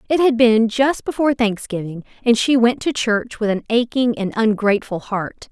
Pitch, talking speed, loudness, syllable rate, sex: 230 Hz, 185 wpm, -18 LUFS, 5.0 syllables/s, female